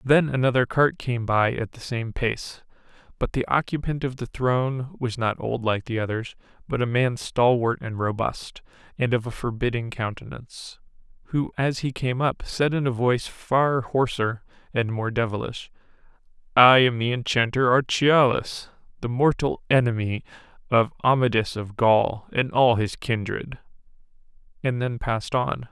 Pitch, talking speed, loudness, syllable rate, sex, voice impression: 120 Hz, 155 wpm, -23 LUFS, 4.5 syllables/s, male, very masculine, very adult-like, middle-aged, thick, slightly tensed, powerful, slightly bright, slightly hard, slightly clear, slightly halting, cool, intellectual, slightly refreshing, sincere, calm, mature, friendly, reassuring, slightly unique, slightly elegant, wild, slightly sweet, slightly lively, kind, slightly modest